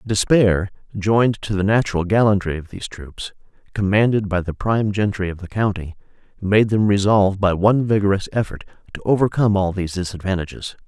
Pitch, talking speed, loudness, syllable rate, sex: 100 Hz, 160 wpm, -19 LUFS, 6.0 syllables/s, male